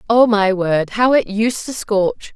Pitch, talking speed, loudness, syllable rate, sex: 215 Hz, 205 wpm, -16 LUFS, 3.7 syllables/s, female